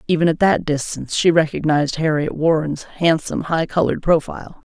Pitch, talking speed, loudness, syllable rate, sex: 155 Hz, 150 wpm, -18 LUFS, 5.8 syllables/s, female